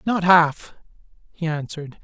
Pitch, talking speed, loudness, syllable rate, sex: 165 Hz, 120 wpm, -19 LUFS, 4.5 syllables/s, male